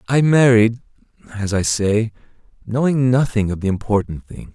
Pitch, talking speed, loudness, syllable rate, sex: 115 Hz, 145 wpm, -17 LUFS, 4.7 syllables/s, male